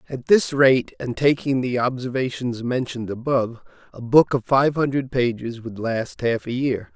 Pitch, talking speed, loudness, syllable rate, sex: 125 Hz, 175 wpm, -21 LUFS, 4.7 syllables/s, male